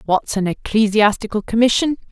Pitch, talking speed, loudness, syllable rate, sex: 220 Hz, 115 wpm, -17 LUFS, 5.4 syllables/s, female